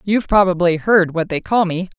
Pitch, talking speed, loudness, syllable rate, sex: 185 Hz, 210 wpm, -16 LUFS, 5.5 syllables/s, female